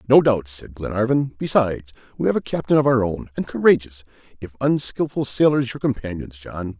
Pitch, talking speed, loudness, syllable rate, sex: 120 Hz, 175 wpm, -21 LUFS, 5.5 syllables/s, male